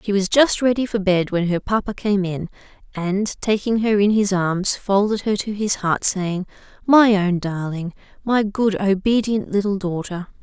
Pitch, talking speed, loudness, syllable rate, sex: 200 Hz, 180 wpm, -20 LUFS, 4.4 syllables/s, female